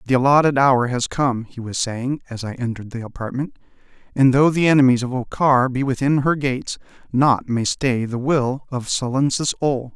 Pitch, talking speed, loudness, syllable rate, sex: 130 Hz, 185 wpm, -19 LUFS, 5.1 syllables/s, male